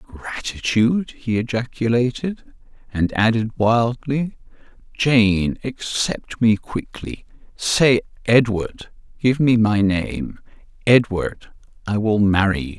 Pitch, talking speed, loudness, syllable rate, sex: 110 Hz, 80 wpm, -19 LUFS, 3.5 syllables/s, male